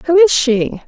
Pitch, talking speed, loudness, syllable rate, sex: 285 Hz, 205 wpm, -13 LUFS, 3.8 syllables/s, female